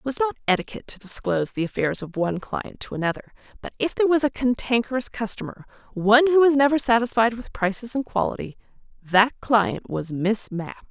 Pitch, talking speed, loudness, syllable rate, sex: 230 Hz, 185 wpm, -23 LUFS, 6.0 syllables/s, female